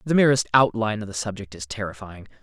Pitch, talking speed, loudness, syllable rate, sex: 105 Hz, 200 wpm, -22 LUFS, 6.6 syllables/s, male